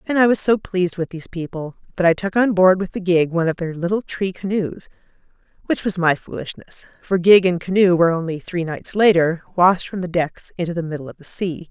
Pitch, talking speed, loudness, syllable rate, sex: 180 Hz, 230 wpm, -19 LUFS, 5.7 syllables/s, female